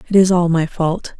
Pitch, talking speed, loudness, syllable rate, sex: 175 Hz, 250 wpm, -16 LUFS, 4.9 syllables/s, female